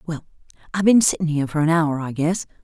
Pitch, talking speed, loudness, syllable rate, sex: 160 Hz, 225 wpm, -20 LUFS, 7.1 syllables/s, female